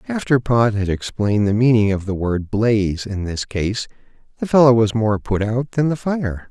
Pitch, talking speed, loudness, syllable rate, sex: 110 Hz, 205 wpm, -18 LUFS, 4.8 syllables/s, male